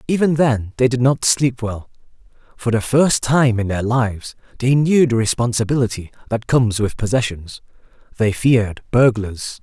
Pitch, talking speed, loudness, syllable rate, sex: 120 Hz, 150 wpm, -17 LUFS, 4.8 syllables/s, male